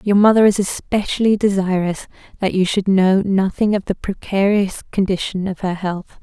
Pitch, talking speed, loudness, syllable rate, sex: 195 Hz, 165 wpm, -18 LUFS, 4.9 syllables/s, female